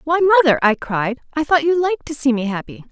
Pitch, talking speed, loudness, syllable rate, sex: 285 Hz, 245 wpm, -17 LUFS, 6.4 syllables/s, female